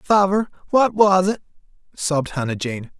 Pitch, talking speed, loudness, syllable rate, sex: 175 Hz, 140 wpm, -19 LUFS, 4.7 syllables/s, male